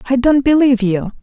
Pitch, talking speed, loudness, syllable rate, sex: 250 Hz, 195 wpm, -13 LUFS, 6.3 syllables/s, female